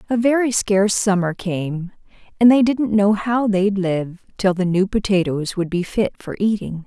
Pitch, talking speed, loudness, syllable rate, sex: 200 Hz, 185 wpm, -19 LUFS, 4.5 syllables/s, female